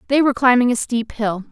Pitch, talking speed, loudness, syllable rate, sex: 240 Hz, 235 wpm, -17 LUFS, 6.2 syllables/s, female